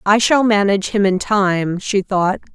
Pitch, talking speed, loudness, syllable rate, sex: 200 Hz, 190 wpm, -16 LUFS, 4.4 syllables/s, female